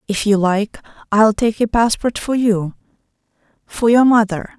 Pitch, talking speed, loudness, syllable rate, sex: 215 Hz, 155 wpm, -16 LUFS, 4.4 syllables/s, female